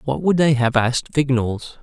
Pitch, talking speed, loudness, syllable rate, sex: 130 Hz, 200 wpm, -19 LUFS, 5.5 syllables/s, male